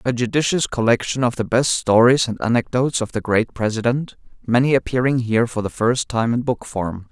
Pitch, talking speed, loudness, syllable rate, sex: 120 Hz, 195 wpm, -19 LUFS, 5.5 syllables/s, male